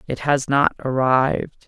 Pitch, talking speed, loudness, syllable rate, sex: 135 Hz, 145 wpm, -19 LUFS, 4.4 syllables/s, female